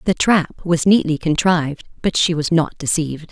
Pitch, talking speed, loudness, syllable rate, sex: 165 Hz, 180 wpm, -18 LUFS, 5.1 syllables/s, female